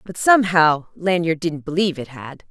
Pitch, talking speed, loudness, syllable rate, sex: 170 Hz, 170 wpm, -18 LUFS, 5.2 syllables/s, female